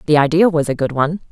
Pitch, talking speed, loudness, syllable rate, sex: 155 Hz, 275 wpm, -16 LUFS, 6.7 syllables/s, female